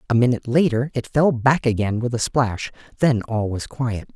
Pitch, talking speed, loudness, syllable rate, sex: 120 Hz, 200 wpm, -21 LUFS, 4.9 syllables/s, male